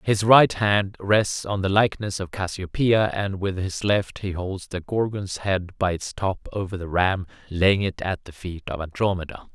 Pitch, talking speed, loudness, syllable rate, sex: 95 Hz, 195 wpm, -23 LUFS, 4.4 syllables/s, male